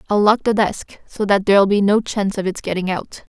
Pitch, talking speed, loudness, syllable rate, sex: 200 Hz, 250 wpm, -18 LUFS, 5.6 syllables/s, female